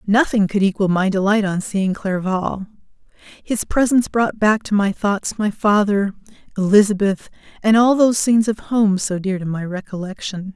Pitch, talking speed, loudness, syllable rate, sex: 205 Hz, 165 wpm, -18 LUFS, 4.8 syllables/s, female